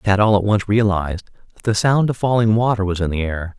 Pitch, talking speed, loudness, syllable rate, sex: 105 Hz, 250 wpm, -18 LUFS, 6.0 syllables/s, male